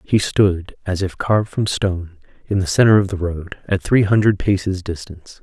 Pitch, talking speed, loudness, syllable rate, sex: 95 Hz, 200 wpm, -18 LUFS, 5.1 syllables/s, male